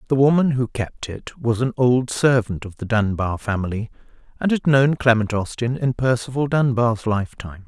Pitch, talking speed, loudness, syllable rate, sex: 120 Hz, 170 wpm, -20 LUFS, 5.0 syllables/s, male